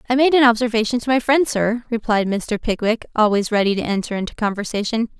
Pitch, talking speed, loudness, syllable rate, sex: 225 Hz, 195 wpm, -19 LUFS, 6.1 syllables/s, female